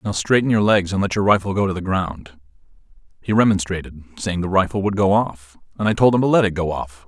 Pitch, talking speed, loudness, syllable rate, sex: 95 Hz, 245 wpm, -19 LUFS, 6.0 syllables/s, male